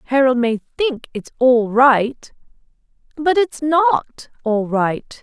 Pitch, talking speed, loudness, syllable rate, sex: 260 Hz, 125 wpm, -17 LUFS, 3.2 syllables/s, female